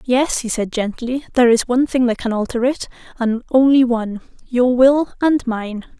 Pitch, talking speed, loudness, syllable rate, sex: 245 Hz, 180 wpm, -17 LUFS, 5.1 syllables/s, female